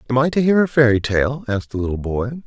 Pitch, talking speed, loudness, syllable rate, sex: 125 Hz, 270 wpm, -18 LUFS, 6.3 syllables/s, male